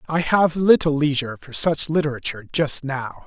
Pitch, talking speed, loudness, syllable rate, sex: 150 Hz, 165 wpm, -20 LUFS, 5.3 syllables/s, male